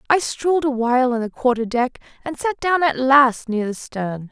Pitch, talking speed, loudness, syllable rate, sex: 260 Hz, 220 wpm, -19 LUFS, 5.0 syllables/s, female